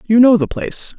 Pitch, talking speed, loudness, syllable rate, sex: 220 Hz, 245 wpm, -14 LUFS, 6.0 syllables/s, female